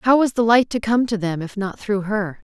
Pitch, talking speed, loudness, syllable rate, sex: 215 Hz, 285 wpm, -20 LUFS, 5.2 syllables/s, female